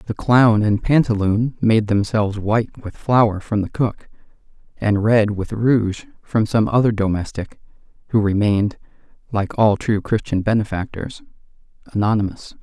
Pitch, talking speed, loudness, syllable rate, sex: 105 Hz, 135 wpm, -19 LUFS, 4.0 syllables/s, male